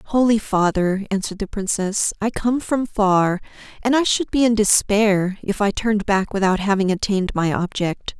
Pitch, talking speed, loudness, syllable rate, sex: 205 Hz, 175 wpm, -19 LUFS, 4.8 syllables/s, female